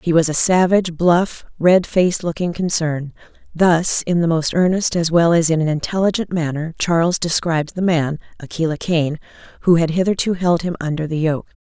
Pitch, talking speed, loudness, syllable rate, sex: 170 Hz, 180 wpm, -17 LUFS, 5.1 syllables/s, female